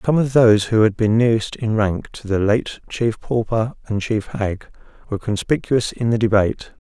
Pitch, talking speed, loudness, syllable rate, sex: 110 Hz, 190 wpm, -19 LUFS, 5.1 syllables/s, male